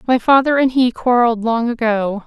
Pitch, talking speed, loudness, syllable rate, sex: 240 Hz, 185 wpm, -15 LUFS, 5.2 syllables/s, female